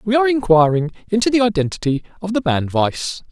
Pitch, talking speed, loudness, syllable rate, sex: 190 Hz, 180 wpm, -18 LUFS, 6.1 syllables/s, male